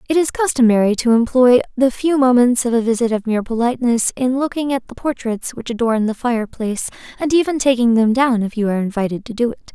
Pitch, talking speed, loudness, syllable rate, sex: 240 Hz, 215 wpm, -17 LUFS, 6.2 syllables/s, female